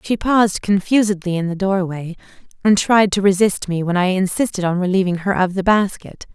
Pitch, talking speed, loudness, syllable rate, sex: 190 Hz, 190 wpm, -17 LUFS, 5.4 syllables/s, female